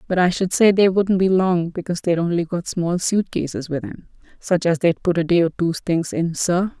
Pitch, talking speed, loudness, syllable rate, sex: 175 Hz, 240 wpm, -19 LUFS, 5.2 syllables/s, female